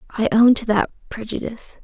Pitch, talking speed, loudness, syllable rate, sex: 225 Hz, 165 wpm, -19 LUFS, 5.8 syllables/s, female